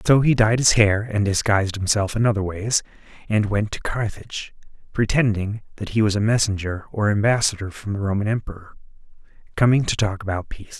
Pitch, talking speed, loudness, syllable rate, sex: 105 Hz, 180 wpm, -21 LUFS, 5.9 syllables/s, male